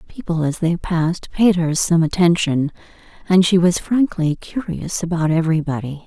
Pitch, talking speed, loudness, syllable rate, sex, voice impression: 170 Hz, 150 wpm, -18 LUFS, 4.9 syllables/s, female, feminine, slightly old, slightly soft, sincere, calm, slightly reassuring, slightly elegant